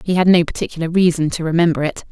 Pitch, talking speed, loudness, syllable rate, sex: 165 Hz, 225 wpm, -16 LUFS, 7.1 syllables/s, female